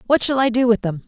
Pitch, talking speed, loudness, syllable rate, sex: 240 Hz, 335 wpm, -18 LUFS, 6.6 syllables/s, female